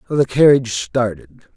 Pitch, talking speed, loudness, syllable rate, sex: 125 Hz, 115 wpm, -16 LUFS, 4.9 syllables/s, male